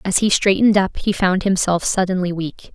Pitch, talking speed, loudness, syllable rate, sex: 185 Hz, 195 wpm, -17 LUFS, 5.3 syllables/s, female